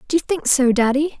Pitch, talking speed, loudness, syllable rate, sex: 280 Hz, 250 wpm, -17 LUFS, 6.2 syllables/s, female